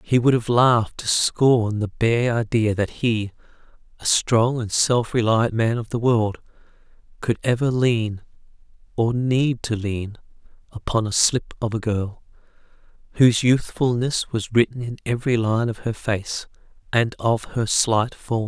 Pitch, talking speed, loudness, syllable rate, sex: 115 Hz, 155 wpm, -21 LUFS, 4.2 syllables/s, male